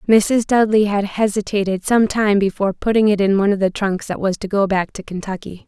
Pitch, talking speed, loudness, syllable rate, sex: 200 Hz, 220 wpm, -18 LUFS, 5.7 syllables/s, female